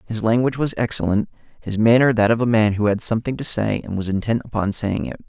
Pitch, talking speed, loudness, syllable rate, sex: 110 Hz, 240 wpm, -20 LUFS, 6.4 syllables/s, male